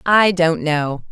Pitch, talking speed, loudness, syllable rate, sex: 165 Hz, 160 wpm, -16 LUFS, 3.1 syllables/s, female